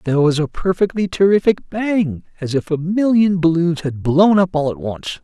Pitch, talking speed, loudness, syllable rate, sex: 170 Hz, 195 wpm, -17 LUFS, 5.0 syllables/s, male